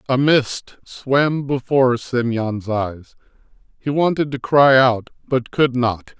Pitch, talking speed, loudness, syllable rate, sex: 130 Hz, 135 wpm, -18 LUFS, 3.5 syllables/s, male